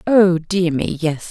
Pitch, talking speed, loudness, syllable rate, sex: 175 Hz, 185 wpm, -17 LUFS, 3.6 syllables/s, female